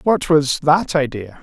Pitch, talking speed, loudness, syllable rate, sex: 150 Hz, 170 wpm, -17 LUFS, 3.9 syllables/s, male